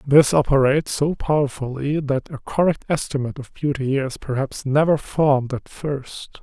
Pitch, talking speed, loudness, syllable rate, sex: 140 Hz, 150 wpm, -21 LUFS, 4.9 syllables/s, male